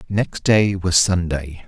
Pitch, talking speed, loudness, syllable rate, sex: 90 Hz, 145 wpm, -18 LUFS, 3.4 syllables/s, male